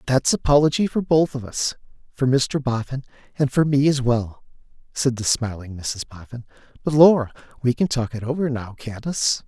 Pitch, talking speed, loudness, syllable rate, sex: 130 Hz, 185 wpm, -21 LUFS, 4.9 syllables/s, male